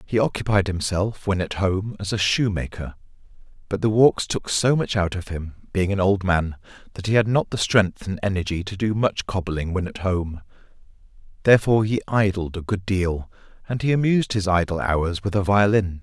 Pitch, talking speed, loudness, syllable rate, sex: 100 Hz, 195 wpm, -22 LUFS, 5.2 syllables/s, male